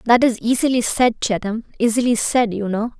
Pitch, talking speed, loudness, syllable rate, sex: 230 Hz, 180 wpm, -18 LUFS, 5.4 syllables/s, female